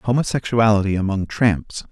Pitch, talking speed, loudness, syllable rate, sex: 105 Hz, 95 wpm, -19 LUFS, 4.8 syllables/s, male